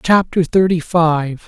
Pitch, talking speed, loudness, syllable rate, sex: 170 Hz, 120 wpm, -15 LUFS, 3.7 syllables/s, male